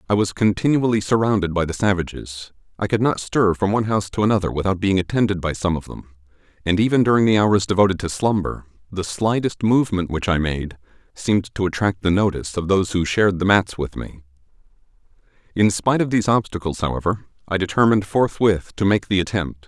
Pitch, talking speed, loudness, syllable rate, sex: 100 Hz, 190 wpm, -20 LUFS, 6.2 syllables/s, male